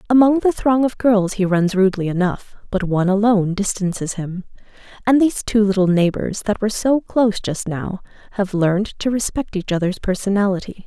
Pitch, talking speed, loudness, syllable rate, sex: 200 Hz, 175 wpm, -18 LUFS, 5.6 syllables/s, female